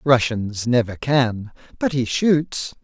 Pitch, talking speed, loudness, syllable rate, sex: 125 Hz, 125 wpm, -20 LUFS, 3.3 syllables/s, male